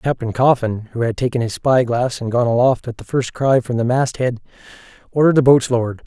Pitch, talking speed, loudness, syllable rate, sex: 125 Hz, 220 wpm, -17 LUFS, 5.9 syllables/s, male